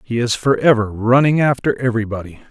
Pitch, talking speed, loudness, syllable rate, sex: 120 Hz, 145 wpm, -16 LUFS, 6.0 syllables/s, male